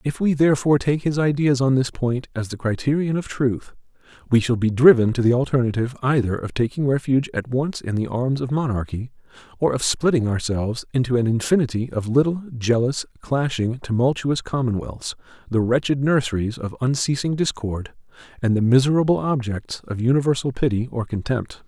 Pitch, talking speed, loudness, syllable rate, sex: 125 Hz, 165 wpm, -21 LUFS, 5.6 syllables/s, male